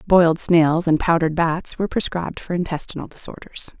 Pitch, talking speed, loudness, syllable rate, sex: 165 Hz, 160 wpm, -20 LUFS, 5.8 syllables/s, female